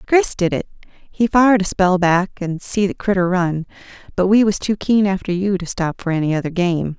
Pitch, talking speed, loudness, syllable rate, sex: 190 Hz, 225 wpm, -18 LUFS, 5.1 syllables/s, female